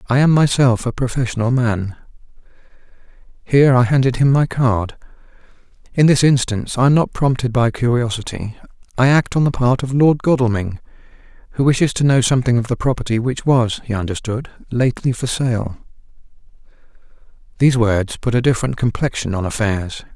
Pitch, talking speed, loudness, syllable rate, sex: 125 Hz, 155 wpm, -17 LUFS, 5.7 syllables/s, male